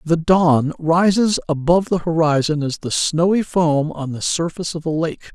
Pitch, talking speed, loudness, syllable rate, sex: 160 Hz, 180 wpm, -18 LUFS, 4.8 syllables/s, male